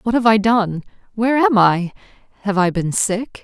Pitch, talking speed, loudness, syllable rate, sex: 210 Hz, 190 wpm, -17 LUFS, 4.8 syllables/s, female